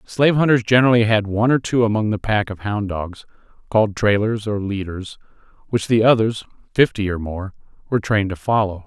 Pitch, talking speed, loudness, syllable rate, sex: 105 Hz, 185 wpm, -19 LUFS, 5.9 syllables/s, male